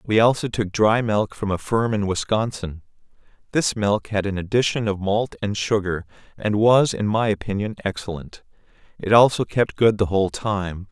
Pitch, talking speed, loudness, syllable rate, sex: 105 Hz, 175 wpm, -21 LUFS, 4.8 syllables/s, male